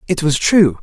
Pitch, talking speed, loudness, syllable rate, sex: 160 Hz, 220 wpm, -14 LUFS, 4.6 syllables/s, male